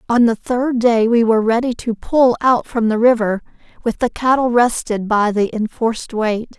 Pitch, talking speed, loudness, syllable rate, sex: 230 Hz, 190 wpm, -16 LUFS, 4.8 syllables/s, female